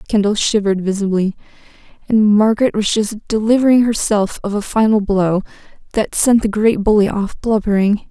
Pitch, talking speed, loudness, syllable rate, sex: 210 Hz, 140 wpm, -15 LUFS, 5.3 syllables/s, female